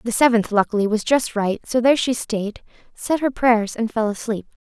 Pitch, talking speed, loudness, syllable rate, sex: 230 Hz, 205 wpm, -20 LUFS, 5.2 syllables/s, female